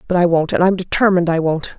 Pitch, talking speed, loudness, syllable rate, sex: 170 Hz, 270 wpm, -16 LUFS, 7.1 syllables/s, female